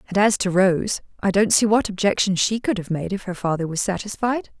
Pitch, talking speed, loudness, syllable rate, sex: 195 Hz, 235 wpm, -21 LUFS, 5.5 syllables/s, female